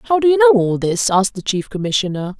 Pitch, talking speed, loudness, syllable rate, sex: 205 Hz, 250 wpm, -16 LUFS, 6.7 syllables/s, female